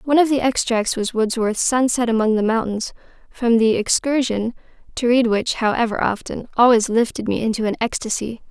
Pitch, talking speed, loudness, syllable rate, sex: 235 Hz, 170 wpm, -19 LUFS, 5.4 syllables/s, female